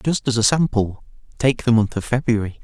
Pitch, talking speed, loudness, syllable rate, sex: 120 Hz, 205 wpm, -19 LUFS, 5.4 syllables/s, male